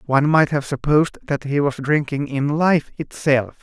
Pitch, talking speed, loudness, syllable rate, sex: 145 Hz, 180 wpm, -19 LUFS, 4.8 syllables/s, male